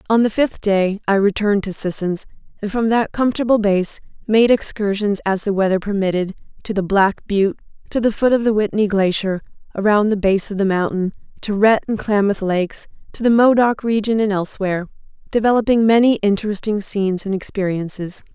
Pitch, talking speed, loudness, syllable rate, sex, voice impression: 205 Hz, 175 wpm, -18 LUFS, 5.6 syllables/s, female, very feminine, very adult-like, thin, tensed, powerful, bright, hard, very clear, fluent, slightly raspy, cute, intellectual, refreshing, very sincere, very calm, friendly, reassuring, unique, very elegant, slightly wild, very sweet, lively, kind, slightly modest